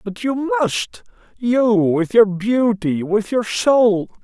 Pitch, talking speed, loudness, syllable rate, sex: 200 Hz, 125 wpm, -17 LUFS, 3.0 syllables/s, male